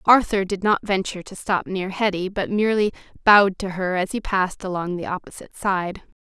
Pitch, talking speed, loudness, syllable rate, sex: 195 Hz, 195 wpm, -22 LUFS, 5.7 syllables/s, female